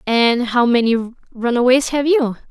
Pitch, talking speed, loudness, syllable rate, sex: 245 Hz, 145 wpm, -16 LUFS, 4.0 syllables/s, female